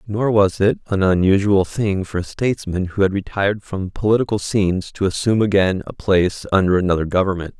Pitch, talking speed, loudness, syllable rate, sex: 95 Hz, 180 wpm, -18 LUFS, 5.8 syllables/s, male